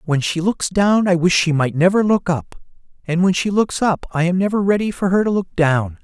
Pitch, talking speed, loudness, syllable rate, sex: 180 Hz, 250 wpm, -17 LUFS, 5.2 syllables/s, male